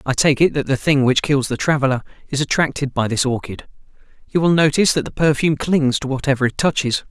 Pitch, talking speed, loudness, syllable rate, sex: 140 Hz, 220 wpm, -18 LUFS, 6.2 syllables/s, male